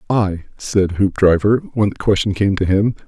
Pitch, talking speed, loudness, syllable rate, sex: 100 Hz, 175 wpm, -17 LUFS, 4.9 syllables/s, male